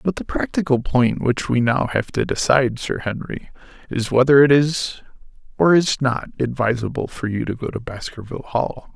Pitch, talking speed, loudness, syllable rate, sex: 125 Hz, 180 wpm, -20 LUFS, 5.1 syllables/s, male